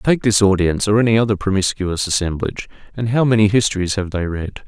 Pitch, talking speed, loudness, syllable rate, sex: 100 Hz, 190 wpm, -17 LUFS, 6.2 syllables/s, male